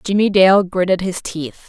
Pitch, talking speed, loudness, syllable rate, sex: 185 Hz, 180 wpm, -15 LUFS, 4.6 syllables/s, female